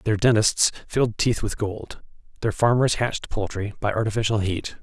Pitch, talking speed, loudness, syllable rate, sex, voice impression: 110 Hz, 160 wpm, -23 LUFS, 5.1 syllables/s, male, very masculine, very adult-like, slightly thick, slightly fluent, cool, slightly intellectual, slightly calm